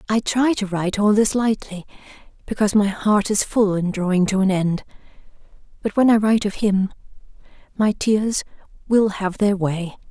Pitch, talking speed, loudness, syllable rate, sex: 205 Hz, 170 wpm, -20 LUFS, 5.0 syllables/s, female